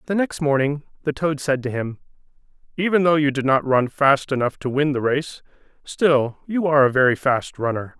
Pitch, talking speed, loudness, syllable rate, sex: 140 Hz, 205 wpm, -20 LUFS, 5.2 syllables/s, male